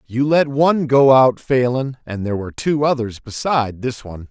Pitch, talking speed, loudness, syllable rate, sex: 130 Hz, 195 wpm, -17 LUFS, 5.3 syllables/s, male